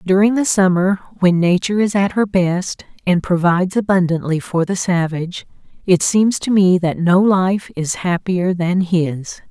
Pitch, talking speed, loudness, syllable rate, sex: 185 Hz, 165 wpm, -16 LUFS, 4.5 syllables/s, female